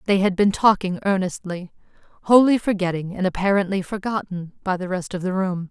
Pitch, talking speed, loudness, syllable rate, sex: 190 Hz, 170 wpm, -21 LUFS, 5.5 syllables/s, female